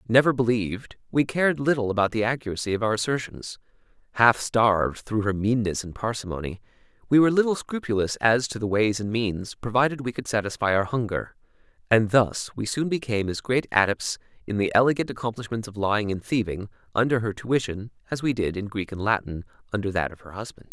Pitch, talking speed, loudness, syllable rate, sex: 115 Hz, 190 wpm, -24 LUFS, 6.0 syllables/s, male